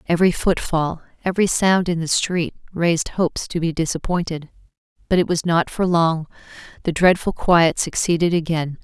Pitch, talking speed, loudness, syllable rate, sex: 170 Hz, 155 wpm, -20 LUFS, 5.2 syllables/s, female